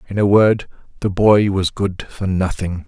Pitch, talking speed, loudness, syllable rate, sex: 100 Hz, 190 wpm, -17 LUFS, 4.3 syllables/s, male